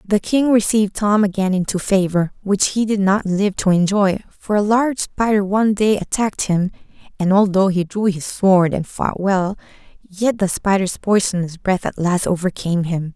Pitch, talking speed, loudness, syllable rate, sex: 195 Hz, 185 wpm, -18 LUFS, 4.9 syllables/s, female